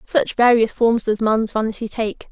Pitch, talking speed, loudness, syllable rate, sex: 225 Hz, 180 wpm, -18 LUFS, 4.5 syllables/s, female